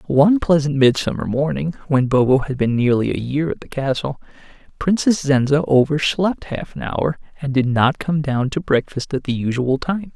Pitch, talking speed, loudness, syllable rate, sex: 145 Hz, 190 wpm, -19 LUFS, 5.0 syllables/s, male